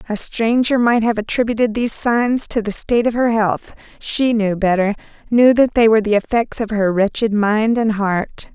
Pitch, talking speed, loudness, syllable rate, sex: 220 Hz, 195 wpm, -16 LUFS, 4.9 syllables/s, female